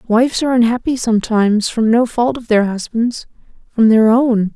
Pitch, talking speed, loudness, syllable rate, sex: 225 Hz, 160 wpm, -14 LUFS, 5.3 syllables/s, female